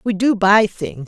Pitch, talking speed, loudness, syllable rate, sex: 205 Hz, 225 wpm, -15 LUFS, 4.1 syllables/s, female